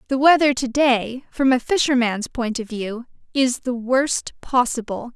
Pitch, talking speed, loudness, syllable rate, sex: 250 Hz, 165 wpm, -20 LUFS, 4.2 syllables/s, female